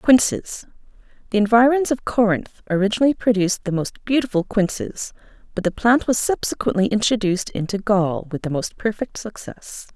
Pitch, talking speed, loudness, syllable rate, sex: 210 Hz, 140 wpm, -20 LUFS, 5.3 syllables/s, female